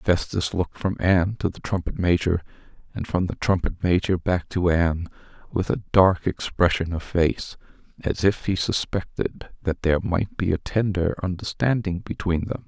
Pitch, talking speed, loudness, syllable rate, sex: 90 Hz, 165 wpm, -24 LUFS, 4.8 syllables/s, male